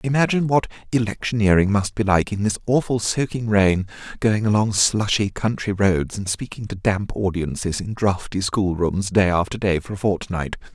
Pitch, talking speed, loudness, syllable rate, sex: 100 Hz, 170 wpm, -21 LUFS, 5.0 syllables/s, male